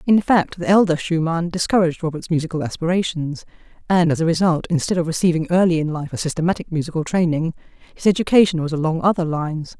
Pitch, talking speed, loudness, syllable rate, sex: 165 Hz, 180 wpm, -19 LUFS, 6.5 syllables/s, female